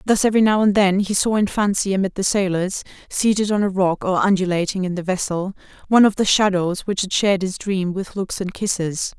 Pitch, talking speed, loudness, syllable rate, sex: 195 Hz, 220 wpm, -19 LUFS, 5.7 syllables/s, female